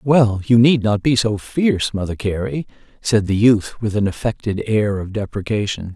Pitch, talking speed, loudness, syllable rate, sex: 110 Hz, 180 wpm, -18 LUFS, 4.7 syllables/s, male